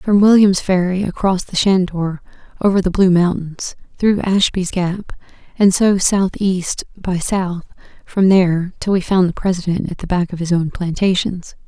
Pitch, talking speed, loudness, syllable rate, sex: 185 Hz, 165 wpm, -16 LUFS, 4.7 syllables/s, female